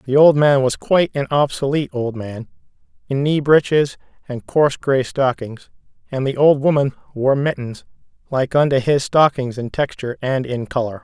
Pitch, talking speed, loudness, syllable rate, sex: 135 Hz, 170 wpm, -18 LUFS, 5.0 syllables/s, male